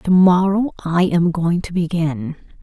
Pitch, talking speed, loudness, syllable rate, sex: 175 Hz, 160 wpm, -17 LUFS, 4.0 syllables/s, female